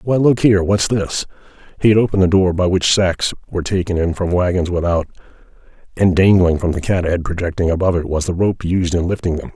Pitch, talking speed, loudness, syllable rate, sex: 90 Hz, 220 wpm, -16 LUFS, 6.2 syllables/s, male